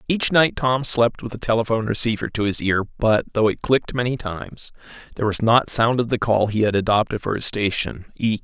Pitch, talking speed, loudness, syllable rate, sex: 115 Hz, 205 wpm, -20 LUFS, 5.8 syllables/s, male